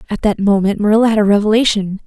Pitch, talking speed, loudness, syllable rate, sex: 210 Hz, 205 wpm, -14 LUFS, 7.1 syllables/s, female